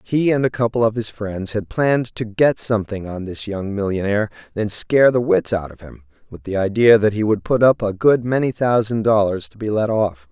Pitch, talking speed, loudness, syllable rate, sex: 105 Hz, 235 wpm, -19 LUFS, 5.4 syllables/s, male